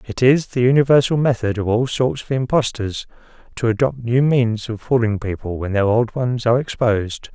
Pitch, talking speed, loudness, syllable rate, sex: 120 Hz, 190 wpm, -18 LUFS, 5.2 syllables/s, male